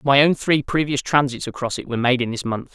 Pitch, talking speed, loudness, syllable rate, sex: 130 Hz, 265 wpm, -20 LUFS, 6.0 syllables/s, male